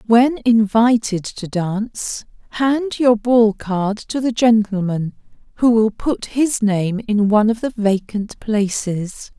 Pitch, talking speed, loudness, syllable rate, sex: 220 Hz, 140 wpm, -18 LUFS, 3.6 syllables/s, female